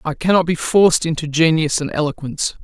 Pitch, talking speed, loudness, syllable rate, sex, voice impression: 160 Hz, 180 wpm, -17 LUFS, 6.1 syllables/s, female, very feminine, adult-like, slightly middle-aged, thin, tensed, powerful, slightly bright, hard, clear, slightly halting, cute, slightly cool, intellectual, very refreshing, sincere, calm, friendly, reassuring, slightly unique, very elegant, slightly wild, slightly sweet, slightly lively, kind, slightly modest